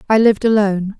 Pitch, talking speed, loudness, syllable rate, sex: 210 Hz, 180 wpm, -15 LUFS, 7.4 syllables/s, female